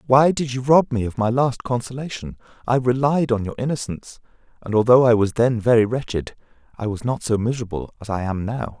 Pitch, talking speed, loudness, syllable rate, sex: 120 Hz, 205 wpm, -20 LUFS, 5.8 syllables/s, male